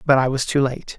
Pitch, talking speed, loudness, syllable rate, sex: 135 Hz, 305 wpm, -20 LUFS, 5.8 syllables/s, male